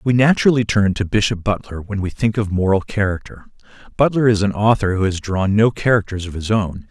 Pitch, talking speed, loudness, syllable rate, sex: 105 Hz, 210 wpm, -18 LUFS, 5.7 syllables/s, male